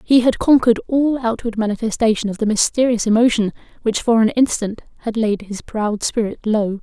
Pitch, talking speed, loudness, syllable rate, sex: 225 Hz, 175 wpm, -18 LUFS, 5.4 syllables/s, female